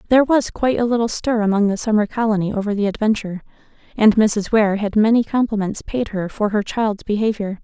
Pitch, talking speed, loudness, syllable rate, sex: 215 Hz, 195 wpm, -18 LUFS, 6.0 syllables/s, female